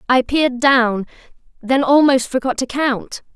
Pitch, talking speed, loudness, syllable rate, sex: 260 Hz, 145 wpm, -16 LUFS, 4.4 syllables/s, female